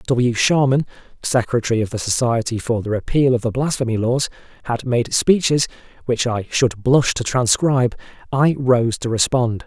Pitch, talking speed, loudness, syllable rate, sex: 125 Hz, 160 wpm, -19 LUFS, 2.9 syllables/s, male